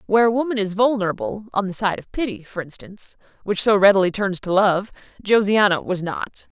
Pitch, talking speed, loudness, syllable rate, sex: 200 Hz, 190 wpm, -20 LUFS, 5.8 syllables/s, female